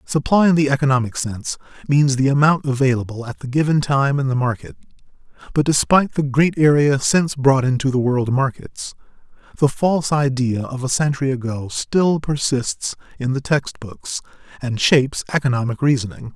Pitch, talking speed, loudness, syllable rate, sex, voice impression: 135 Hz, 160 wpm, -18 LUFS, 5.3 syllables/s, male, masculine, middle-aged, slightly relaxed, powerful, slightly muffled, raspy, cool, intellectual, calm, slightly mature, reassuring, wild, kind, modest